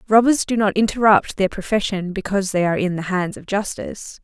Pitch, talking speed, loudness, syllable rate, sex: 195 Hz, 200 wpm, -19 LUFS, 5.9 syllables/s, female